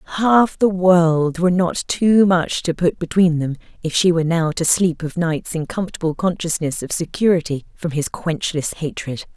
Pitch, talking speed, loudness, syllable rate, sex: 170 Hz, 180 wpm, -18 LUFS, 4.8 syllables/s, female